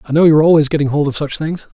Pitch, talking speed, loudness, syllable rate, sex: 150 Hz, 300 wpm, -14 LUFS, 7.7 syllables/s, male